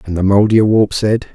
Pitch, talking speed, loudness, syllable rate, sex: 105 Hz, 180 wpm, -13 LUFS, 5.1 syllables/s, male